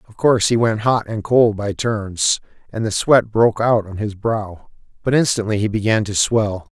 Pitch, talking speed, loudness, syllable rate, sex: 110 Hz, 205 wpm, -18 LUFS, 4.7 syllables/s, male